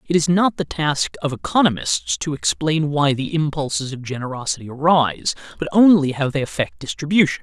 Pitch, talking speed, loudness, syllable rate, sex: 150 Hz, 170 wpm, -19 LUFS, 5.4 syllables/s, male